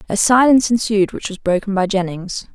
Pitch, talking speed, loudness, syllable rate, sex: 205 Hz, 190 wpm, -16 LUFS, 5.6 syllables/s, female